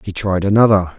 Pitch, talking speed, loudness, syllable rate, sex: 100 Hz, 185 wpm, -14 LUFS, 5.6 syllables/s, male